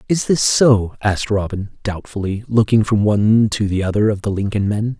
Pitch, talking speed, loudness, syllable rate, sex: 105 Hz, 190 wpm, -17 LUFS, 5.2 syllables/s, male